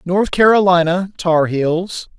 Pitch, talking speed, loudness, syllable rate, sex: 180 Hz, 80 wpm, -15 LUFS, 3.7 syllables/s, male